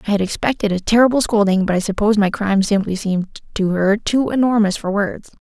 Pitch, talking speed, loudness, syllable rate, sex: 205 Hz, 210 wpm, -17 LUFS, 6.1 syllables/s, female